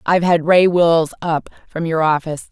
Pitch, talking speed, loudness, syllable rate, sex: 165 Hz, 190 wpm, -16 LUFS, 5.2 syllables/s, female